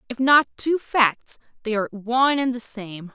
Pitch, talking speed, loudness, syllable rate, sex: 240 Hz, 190 wpm, -21 LUFS, 4.6 syllables/s, female